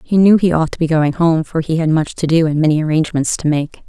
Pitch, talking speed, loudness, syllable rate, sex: 160 Hz, 295 wpm, -15 LUFS, 6.2 syllables/s, female